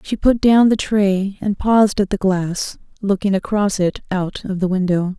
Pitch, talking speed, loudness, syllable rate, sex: 195 Hz, 195 wpm, -18 LUFS, 4.4 syllables/s, female